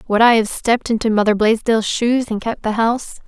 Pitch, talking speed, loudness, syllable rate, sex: 225 Hz, 220 wpm, -17 LUFS, 5.7 syllables/s, female